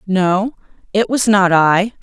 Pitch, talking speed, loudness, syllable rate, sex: 200 Hz, 150 wpm, -14 LUFS, 3.4 syllables/s, female